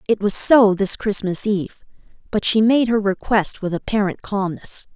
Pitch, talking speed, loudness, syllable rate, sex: 205 Hz, 170 wpm, -18 LUFS, 4.9 syllables/s, female